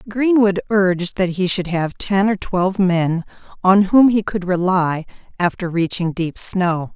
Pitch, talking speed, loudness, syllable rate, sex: 185 Hz, 165 wpm, -18 LUFS, 4.0 syllables/s, female